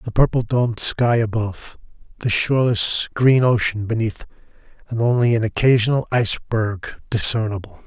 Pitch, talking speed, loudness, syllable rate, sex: 115 Hz, 120 wpm, -19 LUFS, 5.0 syllables/s, male